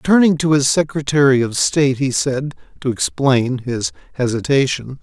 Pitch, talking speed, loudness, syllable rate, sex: 135 Hz, 145 wpm, -17 LUFS, 4.7 syllables/s, male